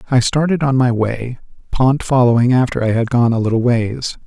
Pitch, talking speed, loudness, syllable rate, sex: 125 Hz, 195 wpm, -15 LUFS, 5.2 syllables/s, male